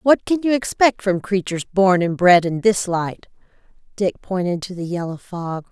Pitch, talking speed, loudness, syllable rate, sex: 190 Hz, 190 wpm, -19 LUFS, 4.6 syllables/s, female